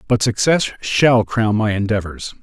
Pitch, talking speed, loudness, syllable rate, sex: 110 Hz, 150 wpm, -17 LUFS, 4.2 syllables/s, male